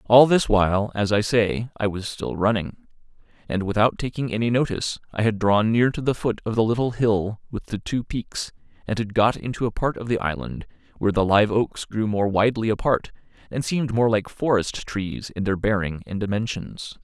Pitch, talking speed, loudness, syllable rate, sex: 110 Hz, 205 wpm, -23 LUFS, 5.3 syllables/s, male